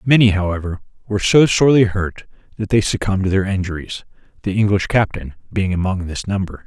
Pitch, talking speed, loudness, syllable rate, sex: 100 Hz, 170 wpm, -18 LUFS, 6.0 syllables/s, male